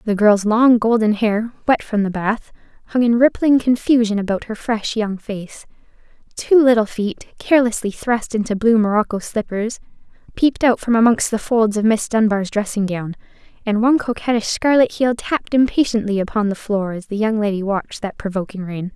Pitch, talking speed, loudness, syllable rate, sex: 220 Hz, 175 wpm, -18 LUFS, 5.3 syllables/s, female